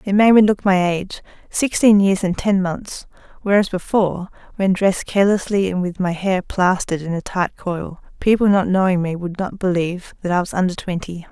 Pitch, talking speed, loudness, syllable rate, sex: 185 Hz, 185 wpm, -18 LUFS, 5.5 syllables/s, female